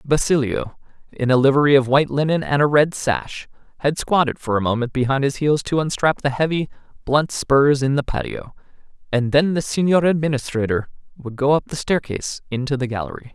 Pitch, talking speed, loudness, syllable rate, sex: 140 Hz, 185 wpm, -19 LUFS, 5.6 syllables/s, male